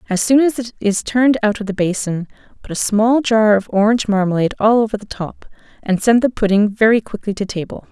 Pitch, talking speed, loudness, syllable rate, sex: 215 Hz, 220 wpm, -16 LUFS, 5.9 syllables/s, female